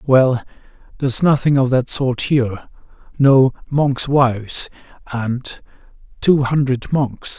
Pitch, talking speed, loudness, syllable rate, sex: 130 Hz, 115 wpm, -17 LUFS, 3.6 syllables/s, male